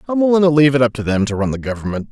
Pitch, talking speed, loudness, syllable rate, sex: 135 Hz, 340 wpm, -16 LUFS, 8.2 syllables/s, male